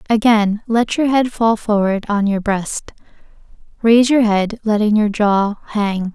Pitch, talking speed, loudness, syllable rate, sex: 215 Hz, 155 wpm, -16 LUFS, 4.2 syllables/s, female